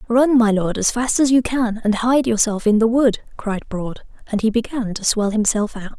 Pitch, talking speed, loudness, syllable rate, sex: 225 Hz, 230 wpm, -18 LUFS, 5.0 syllables/s, female